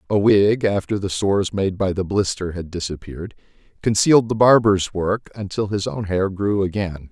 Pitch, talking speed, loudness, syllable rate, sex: 100 Hz, 175 wpm, -20 LUFS, 5.1 syllables/s, male